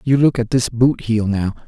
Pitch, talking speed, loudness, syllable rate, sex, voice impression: 115 Hz, 250 wpm, -17 LUFS, 4.8 syllables/s, male, masculine, slightly middle-aged, slightly powerful, slightly bright, fluent, raspy, friendly, slightly wild, lively, kind